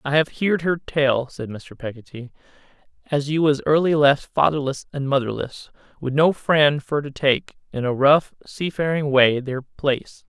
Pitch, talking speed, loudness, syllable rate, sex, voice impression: 140 Hz, 170 wpm, -21 LUFS, 4.4 syllables/s, male, masculine, very adult-like, thick, slightly tensed, slightly powerful, slightly dark, slightly soft, slightly muffled, slightly halting, cool, intellectual, very refreshing, very sincere, calm, slightly mature, friendly, reassuring, slightly unique, slightly elegant, wild, sweet, lively, kind, slightly modest